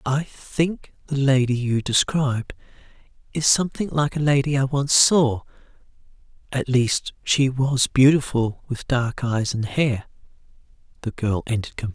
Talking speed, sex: 140 wpm, male